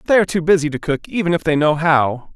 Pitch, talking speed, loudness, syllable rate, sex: 160 Hz, 255 wpm, -17 LUFS, 6.3 syllables/s, male